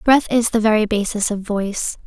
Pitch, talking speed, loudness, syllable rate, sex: 215 Hz, 205 wpm, -18 LUFS, 5.1 syllables/s, female